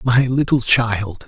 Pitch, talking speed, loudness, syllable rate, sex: 120 Hz, 140 wpm, -17 LUFS, 3.4 syllables/s, male